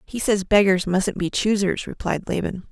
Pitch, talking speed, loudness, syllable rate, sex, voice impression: 195 Hz, 175 wpm, -21 LUFS, 4.6 syllables/s, female, feminine, adult-like, tensed, clear, fluent, intellectual, calm, slightly friendly, elegant, lively, slightly strict, slightly sharp